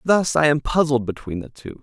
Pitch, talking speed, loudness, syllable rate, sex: 140 Hz, 230 wpm, -20 LUFS, 5.2 syllables/s, male